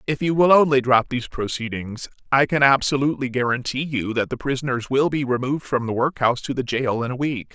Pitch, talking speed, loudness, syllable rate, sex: 130 Hz, 215 wpm, -21 LUFS, 6.0 syllables/s, female